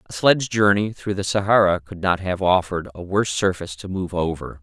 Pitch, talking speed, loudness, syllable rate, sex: 95 Hz, 210 wpm, -21 LUFS, 6.0 syllables/s, male